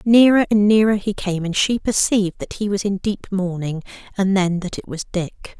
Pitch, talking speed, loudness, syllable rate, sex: 195 Hz, 215 wpm, -19 LUFS, 4.9 syllables/s, female